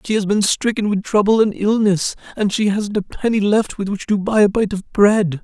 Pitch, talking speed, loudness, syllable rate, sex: 205 Hz, 245 wpm, -17 LUFS, 5.1 syllables/s, male